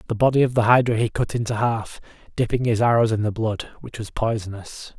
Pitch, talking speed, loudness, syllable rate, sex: 115 Hz, 215 wpm, -21 LUFS, 5.8 syllables/s, male